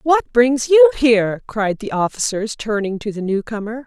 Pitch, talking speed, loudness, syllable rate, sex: 235 Hz, 170 wpm, -17 LUFS, 4.6 syllables/s, female